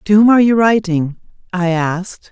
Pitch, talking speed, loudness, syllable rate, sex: 190 Hz, 180 wpm, -14 LUFS, 5.4 syllables/s, female